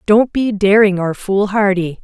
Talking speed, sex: 150 wpm, female